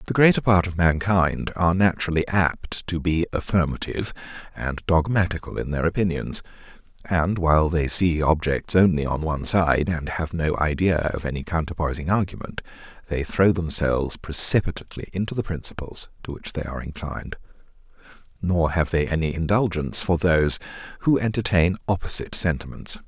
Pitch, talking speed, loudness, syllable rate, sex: 85 Hz, 145 wpm, -23 LUFS, 5.5 syllables/s, male